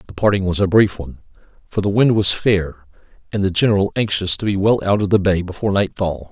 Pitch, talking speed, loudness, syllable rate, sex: 95 Hz, 230 wpm, -17 LUFS, 6.2 syllables/s, male